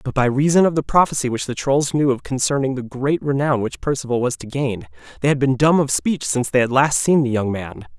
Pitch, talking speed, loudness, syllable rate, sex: 135 Hz, 255 wpm, -19 LUFS, 5.9 syllables/s, male